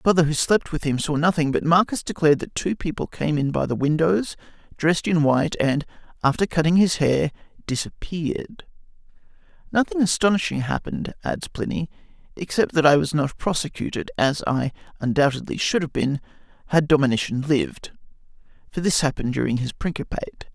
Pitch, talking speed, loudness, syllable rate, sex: 155 Hz, 160 wpm, -22 LUFS, 5.8 syllables/s, male